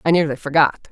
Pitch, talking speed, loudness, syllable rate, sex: 145 Hz, 195 wpm, -18 LUFS, 6.2 syllables/s, female